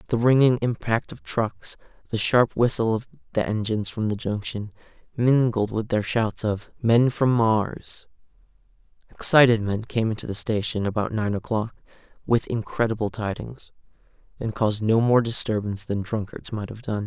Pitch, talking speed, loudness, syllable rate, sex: 110 Hz, 155 wpm, -23 LUFS, 4.9 syllables/s, male